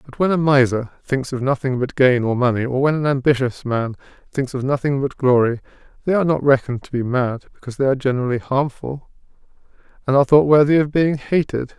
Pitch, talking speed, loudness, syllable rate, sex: 135 Hz, 205 wpm, -18 LUFS, 6.2 syllables/s, male